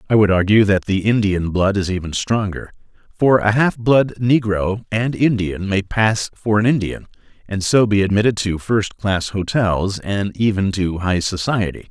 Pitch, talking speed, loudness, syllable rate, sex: 105 Hz, 170 wpm, -18 LUFS, 4.5 syllables/s, male